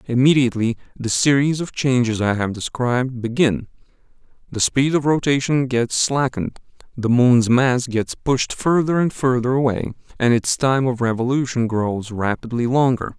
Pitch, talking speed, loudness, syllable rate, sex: 125 Hz, 145 wpm, -19 LUFS, 4.7 syllables/s, male